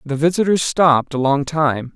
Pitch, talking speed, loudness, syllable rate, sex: 150 Hz, 185 wpm, -17 LUFS, 4.9 syllables/s, male